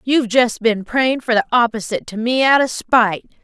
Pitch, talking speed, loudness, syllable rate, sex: 235 Hz, 210 wpm, -16 LUFS, 5.5 syllables/s, female